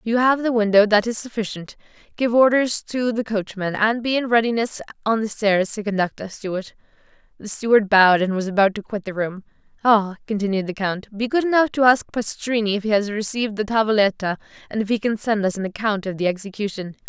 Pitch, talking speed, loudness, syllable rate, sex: 215 Hz, 215 wpm, -20 LUFS, 5.9 syllables/s, female